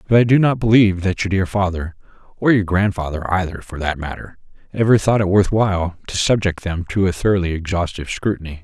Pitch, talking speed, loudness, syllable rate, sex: 95 Hz, 190 wpm, -18 LUFS, 6.1 syllables/s, male